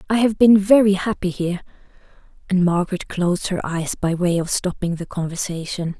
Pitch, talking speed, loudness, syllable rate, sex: 185 Hz, 170 wpm, -20 LUFS, 5.6 syllables/s, female